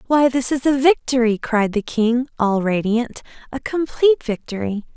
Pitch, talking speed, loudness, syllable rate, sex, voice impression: 245 Hz, 155 wpm, -19 LUFS, 4.7 syllables/s, female, very feminine, slightly young, slightly adult-like, thin, tensed, slightly powerful, bright, soft, clear, fluent, very cute, intellectual, refreshing, very sincere, very calm, very friendly, very reassuring, very unique, very elegant, slightly wild, very sweet, very lively, kind, slightly sharp, slightly modest